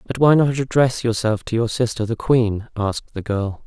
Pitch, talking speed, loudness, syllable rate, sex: 115 Hz, 215 wpm, -20 LUFS, 4.9 syllables/s, male